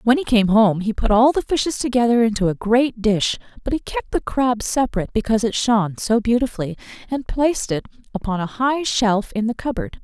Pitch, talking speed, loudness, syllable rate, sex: 230 Hz, 210 wpm, -20 LUFS, 5.7 syllables/s, female